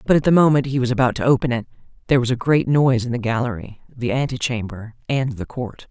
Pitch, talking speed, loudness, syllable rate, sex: 125 Hz, 245 wpm, -20 LUFS, 6.4 syllables/s, female